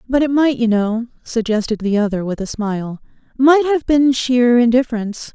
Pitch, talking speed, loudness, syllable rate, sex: 240 Hz, 170 wpm, -16 LUFS, 5.2 syllables/s, female